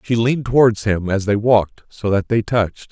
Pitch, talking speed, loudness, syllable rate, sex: 110 Hz, 225 wpm, -17 LUFS, 5.4 syllables/s, male